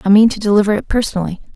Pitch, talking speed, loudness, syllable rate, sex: 205 Hz, 230 wpm, -15 LUFS, 8.3 syllables/s, female